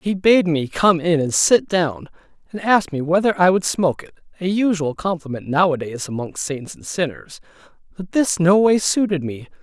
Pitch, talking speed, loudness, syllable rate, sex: 170 Hz, 185 wpm, -19 LUFS, 3.6 syllables/s, male